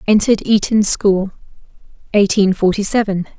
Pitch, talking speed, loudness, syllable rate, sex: 200 Hz, 105 wpm, -15 LUFS, 5.2 syllables/s, female